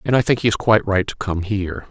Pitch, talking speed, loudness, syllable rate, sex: 100 Hz, 315 wpm, -19 LUFS, 6.6 syllables/s, male